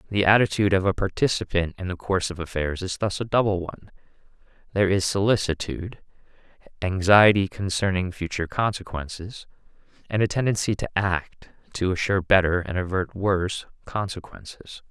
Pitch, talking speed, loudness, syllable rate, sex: 95 Hz, 135 wpm, -23 LUFS, 5.7 syllables/s, male